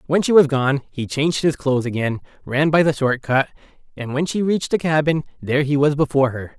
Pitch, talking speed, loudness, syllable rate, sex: 145 Hz, 230 wpm, -19 LUFS, 6.0 syllables/s, male